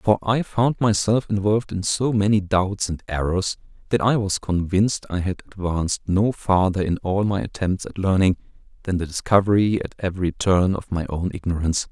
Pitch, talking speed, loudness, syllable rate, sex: 95 Hz, 180 wpm, -22 LUFS, 5.2 syllables/s, male